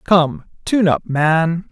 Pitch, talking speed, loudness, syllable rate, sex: 170 Hz, 140 wpm, -16 LUFS, 2.9 syllables/s, female